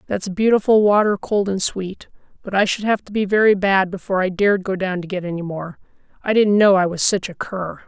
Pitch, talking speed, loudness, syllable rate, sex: 195 Hz, 235 wpm, -18 LUFS, 5.7 syllables/s, female